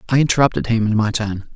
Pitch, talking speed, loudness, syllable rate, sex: 115 Hz, 230 wpm, -18 LUFS, 6.6 syllables/s, male